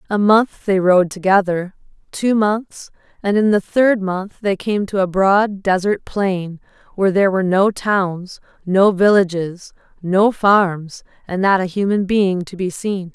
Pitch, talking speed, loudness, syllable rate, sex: 195 Hz, 165 wpm, -17 LUFS, 4.0 syllables/s, female